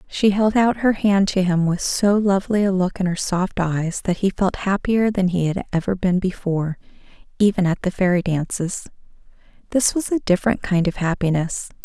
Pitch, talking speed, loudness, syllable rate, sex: 190 Hz, 195 wpm, -20 LUFS, 5.1 syllables/s, female